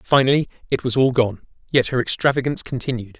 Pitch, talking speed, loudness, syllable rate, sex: 125 Hz, 170 wpm, -20 LUFS, 6.6 syllables/s, male